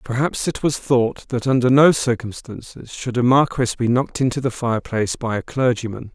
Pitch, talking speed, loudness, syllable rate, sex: 120 Hz, 185 wpm, -19 LUFS, 5.4 syllables/s, male